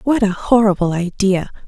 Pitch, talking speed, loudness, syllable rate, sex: 200 Hz, 145 wpm, -16 LUFS, 4.9 syllables/s, female